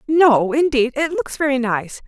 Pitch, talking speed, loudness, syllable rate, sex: 260 Hz, 175 wpm, -18 LUFS, 4.4 syllables/s, female